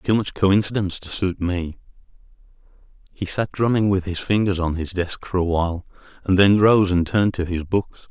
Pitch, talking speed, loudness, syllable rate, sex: 95 Hz, 195 wpm, -21 LUFS, 5.3 syllables/s, male